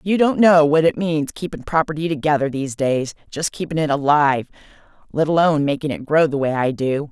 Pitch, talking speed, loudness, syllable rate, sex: 150 Hz, 195 wpm, -19 LUFS, 5.8 syllables/s, female